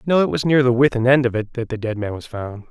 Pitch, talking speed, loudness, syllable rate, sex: 120 Hz, 335 wpm, -19 LUFS, 6.5 syllables/s, male